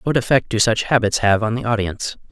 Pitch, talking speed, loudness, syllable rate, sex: 115 Hz, 235 wpm, -18 LUFS, 6.2 syllables/s, male